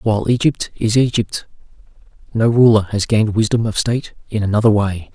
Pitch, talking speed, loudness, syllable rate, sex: 110 Hz, 165 wpm, -16 LUFS, 5.7 syllables/s, male